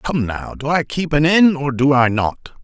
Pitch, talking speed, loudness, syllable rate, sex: 145 Hz, 250 wpm, -17 LUFS, 4.3 syllables/s, male